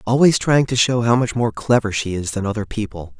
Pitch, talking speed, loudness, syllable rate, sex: 115 Hz, 245 wpm, -18 LUFS, 5.6 syllables/s, male